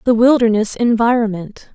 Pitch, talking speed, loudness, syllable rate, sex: 230 Hz, 105 wpm, -14 LUFS, 4.9 syllables/s, female